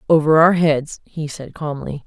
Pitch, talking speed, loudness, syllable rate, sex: 150 Hz, 175 wpm, -18 LUFS, 4.4 syllables/s, female